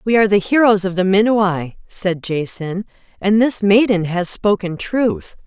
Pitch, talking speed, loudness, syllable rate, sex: 200 Hz, 165 wpm, -16 LUFS, 4.3 syllables/s, female